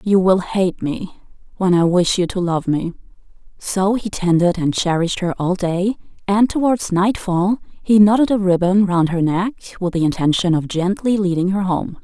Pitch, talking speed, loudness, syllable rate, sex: 185 Hz, 185 wpm, -18 LUFS, 4.6 syllables/s, female